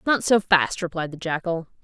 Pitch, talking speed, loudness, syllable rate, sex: 175 Hz, 195 wpm, -22 LUFS, 5.1 syllables/s, female